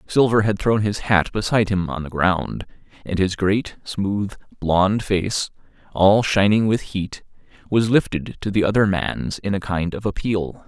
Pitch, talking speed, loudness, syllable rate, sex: 100 Hz, 175 wpm, -20 LUFS, 4.2 syllables/s, male